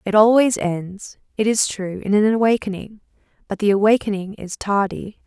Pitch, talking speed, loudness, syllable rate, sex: 205 Hz, 160 wpm, -19 LUFS, 5.0 syllables/s, female